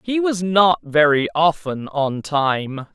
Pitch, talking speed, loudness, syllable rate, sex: 165 Hz, 140 wpm, -18 LUFS, 3.3 syllables/s, male